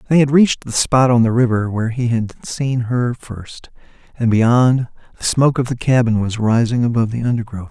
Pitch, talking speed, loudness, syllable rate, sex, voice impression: 120 Hz, 200 wpm, -16 LUFS, 5.3 syllables/s, male, very masculine, very adult-like, middle-aged, very thick, slightly relaxed, slightly weak, slightly dark, soft, slightly muffled, fluent, cool, very intellectual, refreshing, sincere, calm, slightly mature, slightly reassuring, very unique, slightly elegant, wild, sweet, kind, modest